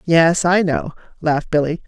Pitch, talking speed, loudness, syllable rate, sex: 165 Hz, 160 wpm, -17 LUFS, 4.7 syllables/s, female